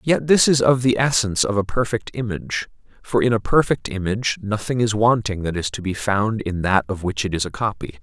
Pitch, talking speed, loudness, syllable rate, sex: 110 Hz, 230 wpm, -20 LUFS, 5.6 syllables/s, male